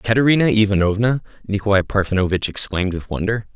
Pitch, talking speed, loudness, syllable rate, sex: 105 Hz, 120 wpm, -18 LUFS, 6.4 syllables/s, male